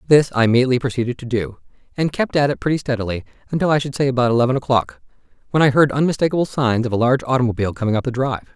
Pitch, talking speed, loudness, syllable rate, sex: 125 Hz, 225 wpm, -19 LUFS, 7.9 syllables/s, male